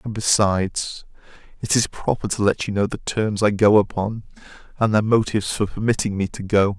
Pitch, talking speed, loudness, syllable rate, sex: 105 Hz, 195 wpm, -20 LUFS, 5.4 syllables/s, male